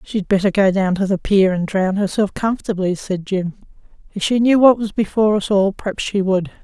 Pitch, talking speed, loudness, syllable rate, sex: 200 Hz, 215 wpm, -17 LUFS, 5.5 syllables/s, female